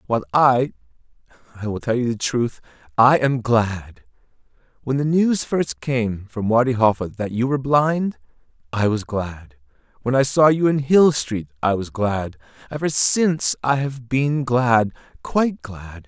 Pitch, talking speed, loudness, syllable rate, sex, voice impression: 120 Hz, 155 wpm, -20 LUFS, 4.2 syllables/s, male, masculine, adult-like, slightly thick, dark, cool, slightly sincere, slightly calm